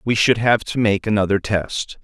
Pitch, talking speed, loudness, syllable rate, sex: 105 Hz, 205 wpm, -18 LUFS, 4.7 syllables/s, male